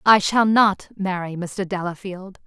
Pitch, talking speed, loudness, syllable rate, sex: 190 Hz, 145 wpm, -20 LUFS, 4.0 syllables/s, female